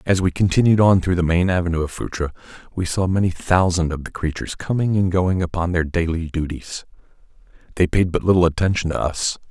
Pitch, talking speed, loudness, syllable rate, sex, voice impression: 90 Hz, 195 wpm, -20 LUFS, 5.9 syllables/s, male, masculine, adult-like, thick, tensed, slightly powerful, hard, clear, fluent, cool, mature, friendly, wild, lively, slightly strict